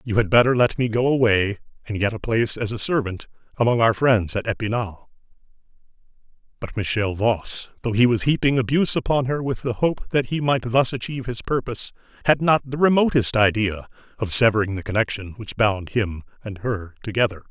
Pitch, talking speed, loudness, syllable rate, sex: 115 Hz, 185 wpm, -21 LUFS, 5.6 syllables/s, male